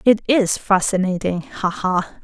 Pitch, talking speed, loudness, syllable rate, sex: 195 Hz, 135 wpm, -19 LUFS, 3.9 syllables/s, female